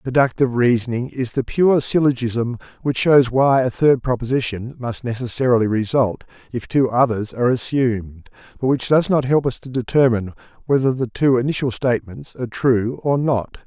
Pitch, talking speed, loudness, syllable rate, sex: 125 Hz, 160 wpm, -19 LUFS, 5.3 syllables/s, male